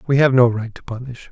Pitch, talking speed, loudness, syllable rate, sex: 125 Hz, 275 wpm, -16 LUFS, 6.1 syllables/s, male